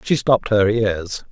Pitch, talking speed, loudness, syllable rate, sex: 110 Hz, 185 wpm, -18 LUFS, 4.3 syllables/s, male